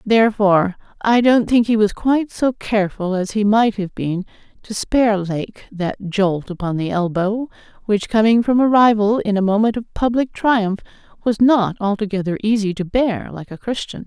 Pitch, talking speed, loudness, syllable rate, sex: 210 Hz, 180 wpm, -18 LUFS, 4.9 syllables/s, female